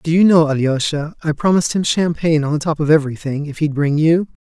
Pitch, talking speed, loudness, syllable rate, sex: 155 Hz, 230 wpm, -16 LUFS, 6.2 syllables/s, male